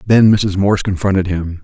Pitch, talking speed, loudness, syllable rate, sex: 95 Hz, 185 wpm, -14 LUFS, 5.3 syllables/s, male